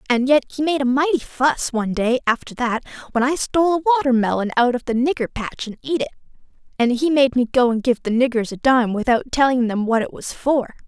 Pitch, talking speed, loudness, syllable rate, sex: 255 Hz, 230 wpm, -19 LUFS, 5.9 syllables/s, female